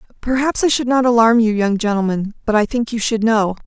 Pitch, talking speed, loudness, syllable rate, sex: 225 Hz, 230 wpm, -16 LUFS, 5.9 syllables/s, female